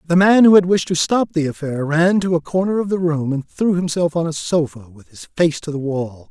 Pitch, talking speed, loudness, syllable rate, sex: 165 Hz, 265 wpm, -17 LUFS, 5.3 syllables/s, male